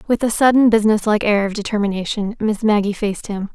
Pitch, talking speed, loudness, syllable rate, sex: 210 Hz, 185 wpm, -17 LUFS, 6.6 syllables/s, female